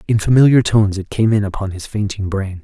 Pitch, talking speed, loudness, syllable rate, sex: 105 Hz, 230 wpm, -16 LUFS, 6.1 syllables/s, male